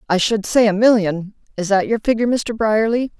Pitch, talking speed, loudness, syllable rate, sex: 215 Hz, 205 wpm, -17 LUFS, 5.5 syllables/s, female